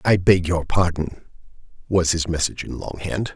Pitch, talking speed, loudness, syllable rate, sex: 85 Hz, 180 wpm, -22 LUFS, 5.0 syllables/s, male